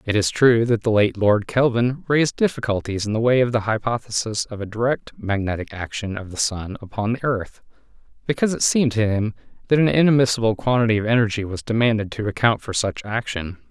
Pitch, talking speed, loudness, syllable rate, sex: 115 Hz, 195 wpm, -21 LUFS, 5.9 syllables/s, male